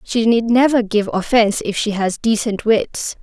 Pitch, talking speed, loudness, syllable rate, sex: 220 Hz, 185 wpm, -17 LUFS, 4.6 syllables/s, female